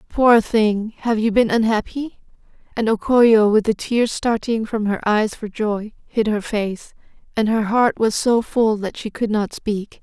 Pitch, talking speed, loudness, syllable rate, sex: 220 Hz, 190 wpm, -19 LUFS, 4.1 syllables/s, female